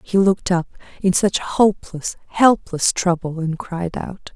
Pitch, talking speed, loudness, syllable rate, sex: 180 Hz, 150 wpm, -19 LUFS, 4.3 syllables/s, female